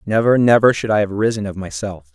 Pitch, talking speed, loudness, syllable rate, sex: 105 Hz, 225 wpm, -17 LUFS, 5.9 syllables/s, male